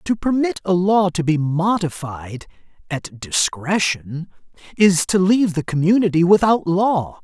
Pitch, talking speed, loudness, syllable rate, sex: 175 Hz, 135 wpm, -18 LUFS, 4.2 syllables/s, male